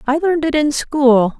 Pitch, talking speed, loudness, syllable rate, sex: 285 Hz, 215 wpm, -15 LUFS, 4.9 syllables/s, female